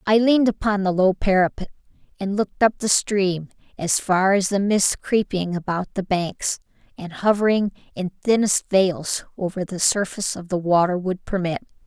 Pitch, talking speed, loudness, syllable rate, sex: 190 Hz, 165 wpm, -21 LUFS, 4.8 syllables/s, female